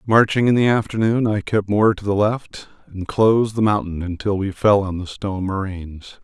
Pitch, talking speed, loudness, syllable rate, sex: 100 Hz, 200 wpm, -19 LUFS, 5.0 syllables/s, male